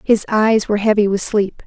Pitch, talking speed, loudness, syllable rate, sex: 210 Hz, 215 wpm, -16 LUFS, 5.3 syllables/s, female